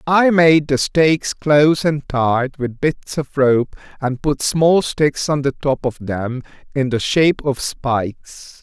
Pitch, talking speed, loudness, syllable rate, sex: 140 Hz, 175 wpm, -17 LUFS, 3.7 syllables/s, male